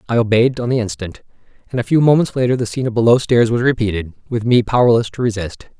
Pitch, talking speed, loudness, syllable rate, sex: 120 Hz, 230 wpm, -16 LUFS, 6.8 syllables/s, male